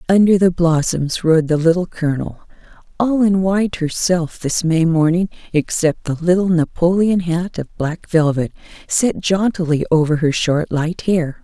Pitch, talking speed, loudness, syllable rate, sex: 170 Hz, 150 wpm, -17 LUFS, 4.5 syllables/s, female